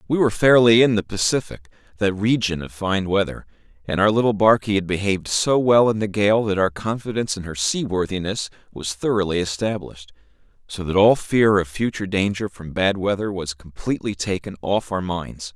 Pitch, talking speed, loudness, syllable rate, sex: 100 Hz, 180 wpm, -20 LUFS, 5.5 syllables/s, male